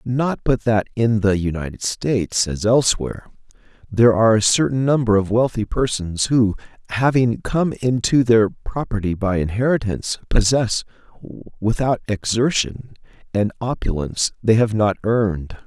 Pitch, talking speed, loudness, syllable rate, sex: 110 Hz, 130 wpm, -19 LUFS, 4.8 syllables/s, male